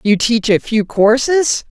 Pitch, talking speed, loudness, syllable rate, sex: 235 Hz, 165 wpm, -14 LUFS, 3.8 syllables/s, female